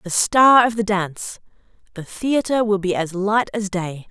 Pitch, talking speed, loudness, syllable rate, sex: 205 Hz, 190 wpm, -18 LUFS, 4.5 syllables/s, female